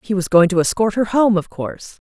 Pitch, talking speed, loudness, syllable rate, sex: 195 Hz, 255 wpm, -17 LUFS, 5.8 syllables/s, female